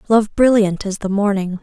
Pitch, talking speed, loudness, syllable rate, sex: 205 Hz, 185 wpm, -16 LUFS, 4.8 syllables/s, female